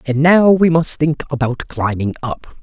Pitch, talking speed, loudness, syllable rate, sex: 145 Hz, 185 wpm, -15 LUFS, 4.3 syllables/s, male